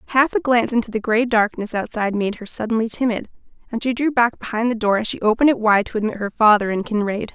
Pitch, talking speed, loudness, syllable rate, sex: 225 Hz, 245 wpm, -19 LUFS, 6.5 syllables/s, female